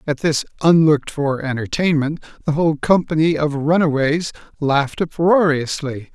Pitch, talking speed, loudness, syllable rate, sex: 150 Hz, 115 wpm, -18 LUFS, 4.9 syllables/s, male